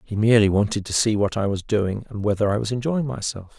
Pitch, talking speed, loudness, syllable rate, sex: 110 Hz, 250 wpm, -22 LUFS, 6.1 syllables/s, male